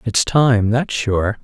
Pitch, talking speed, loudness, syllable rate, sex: 115 Hz, 165 wpm, -16 LUFS, 3.1 syllables/s, male